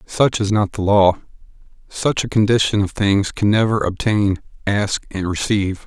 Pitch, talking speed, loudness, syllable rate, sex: 105 Hz, 165 wpm, -18 LUFS, 4.6 syllables/s, male